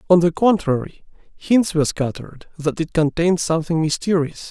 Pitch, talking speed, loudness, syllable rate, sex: 165 Hz, 145 wpm, -19 LUFS, 5.6 syllables/s, male